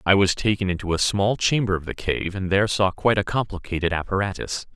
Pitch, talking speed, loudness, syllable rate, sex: 95 Hz, 215 wpm, -22 LUFS, 6.1 syllables/s, male